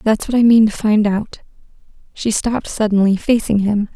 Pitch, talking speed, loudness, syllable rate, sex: 215 Hz, 180 wpm, -16 LUFS, 5.1 syllables/s, female